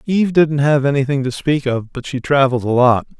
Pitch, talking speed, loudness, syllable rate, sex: 135 Hz, 225 wpm, -16 LUFS, 5.7 syllables/s, male